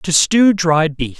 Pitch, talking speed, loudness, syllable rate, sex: 170 Hz, 200 wpm, -14 LUFS, 3.5 syllables/s, male